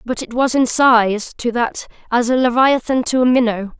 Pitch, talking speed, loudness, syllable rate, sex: 245 Hz, 190 wpm, -16 LUFS, 4.7 syllables/s, female